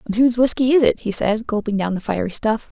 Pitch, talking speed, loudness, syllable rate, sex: 225 Hz, 255 wpm, -19 LUFS, 6.3 syllables/s, female